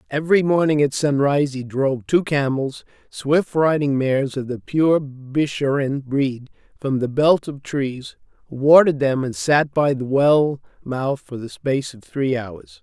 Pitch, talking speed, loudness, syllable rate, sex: 140 Hz, 165 wpm, -20 LUFS, 4.2 syllables/s, male